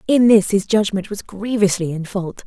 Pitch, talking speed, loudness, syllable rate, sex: 200 Hz, 195 wpm, -18 LUFS, 4.8 syllables/s, female